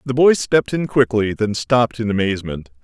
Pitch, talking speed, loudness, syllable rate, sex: 115 Hz, 190 wpm, -18 LUFS, 5.7 syllables/s, male